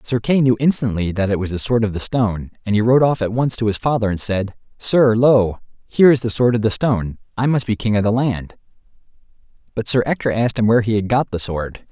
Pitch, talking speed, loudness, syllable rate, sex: 115 Hz, 245 wpm, -18 LUFS, 5.9 syllables/s, male